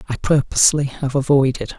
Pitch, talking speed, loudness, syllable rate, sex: 135 Hz, 135 wpm, -17 LUFS, 5.6 syllables/s, male